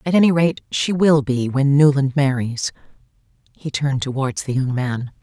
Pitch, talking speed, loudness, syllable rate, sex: 140 Hz, 170 wpm, -19 LUFS, 4.8 syllables/s, female